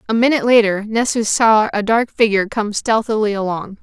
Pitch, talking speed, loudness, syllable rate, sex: 215 Hz, 175 wpm, -16 LUFS, 5.6 syllables/s, female